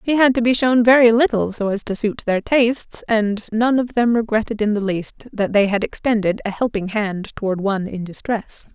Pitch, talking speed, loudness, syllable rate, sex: 220 Hz, 220 wpm, -18 LUFS, 5.1 syllables/s, female